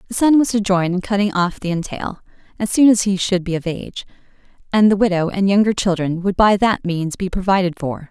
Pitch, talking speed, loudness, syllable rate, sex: 190 Hz, 230 wpm, -17 LUFS, 5.7 syllables/s, female